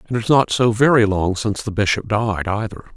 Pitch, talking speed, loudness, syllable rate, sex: 110 Hz, 245 wpm, -18 LUFS, 5.8 syllables/s, male